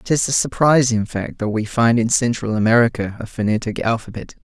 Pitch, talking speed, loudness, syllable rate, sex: 115 Hz, 190 wpm, -18 LUFS, 5.5 syllables/s, male